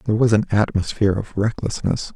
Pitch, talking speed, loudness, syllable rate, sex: 105 Hz, 165 wpm, -20 LUFS, 6.3 syllables/s, male